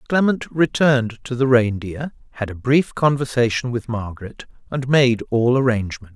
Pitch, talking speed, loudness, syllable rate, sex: 125 Hz, 145 wpm, -19 LUFS, 5.0 syllables/s, male